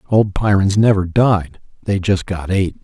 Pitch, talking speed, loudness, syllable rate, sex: 100 Hz, 170 wpm, -16 LUFS, 4.4 syllables/s, male